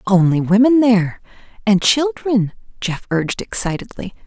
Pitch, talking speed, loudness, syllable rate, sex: 210 Hz, 100 wpm, -17 LUFS, 4.8 syllables/s, female